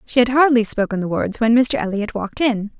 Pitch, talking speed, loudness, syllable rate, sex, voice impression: 230 Hz, 235 wpm, -18 LUFS, 5.7 syllables/s, female, feminine, adult-like, fluent, slightly intellectual, slightly sweet